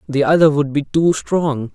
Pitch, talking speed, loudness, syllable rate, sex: 150 Hz, 205 wpm, -16 LUFS, 4.4 syllables/s, male